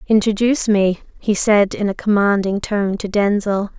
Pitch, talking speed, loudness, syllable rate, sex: 205 Hz, 160 wpm, -17 LUFS, 4.6 syllables/s, female